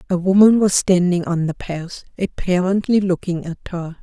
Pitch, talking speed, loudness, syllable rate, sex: 180 Hz, 165 wpm, -18 LUFS, 4.9 syllables/s, female